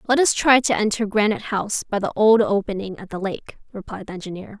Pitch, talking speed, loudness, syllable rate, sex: 210 Hz, 220 wpm, -20 LUFS, 6.2 syllables/s, female